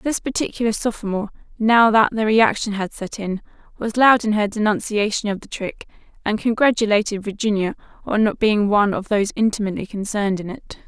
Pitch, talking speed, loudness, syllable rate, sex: 210 Hz, 170 wpm, -20 LUFS, 5.8 syllables/s, female